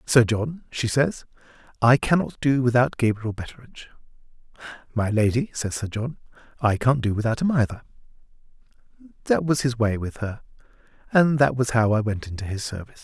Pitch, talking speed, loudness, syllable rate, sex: 120 Hz, 160 wpm, -23 LUFS, 5.4 syllables/s, male